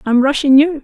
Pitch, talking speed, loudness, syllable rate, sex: 280 Hz, 215 wpm, -12 LUFS, 5.6 syllables/s, female